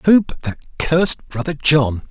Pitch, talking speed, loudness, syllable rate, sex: 150 Hz, 170 wpm, -17 LUFS, 4.6 syllables/s, male